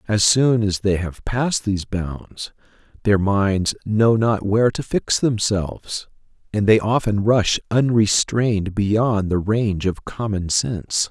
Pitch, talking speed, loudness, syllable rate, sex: 105 Hz, 145 wpm, -20 LUFS, 4.0 syllables/s, male